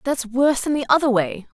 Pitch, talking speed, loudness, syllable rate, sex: 250 Hz, 225 wpm, -20 LUFS, 6.1 syllables/s, female